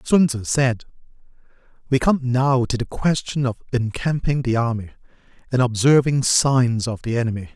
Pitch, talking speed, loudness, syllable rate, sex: 125 Hz, 150 wpm, -20 LUFS, 4.9 syllables/s, male